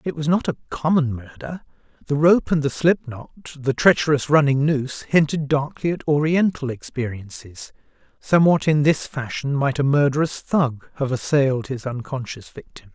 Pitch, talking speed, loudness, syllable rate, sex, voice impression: 140 Hz, 160 wpm, -20 LUFS, 5.0 syllables/s, male, very masculine, slightly middle-aged, thick, slightly relaxed, powerful, bright, soft, clear, fluent, cool, intellectual, slightly refreshing, sincere, calm, mature, friendly, reassuring, slightly unique, elegant, slightly wild, slightly sweet, lively, kind, slightly intense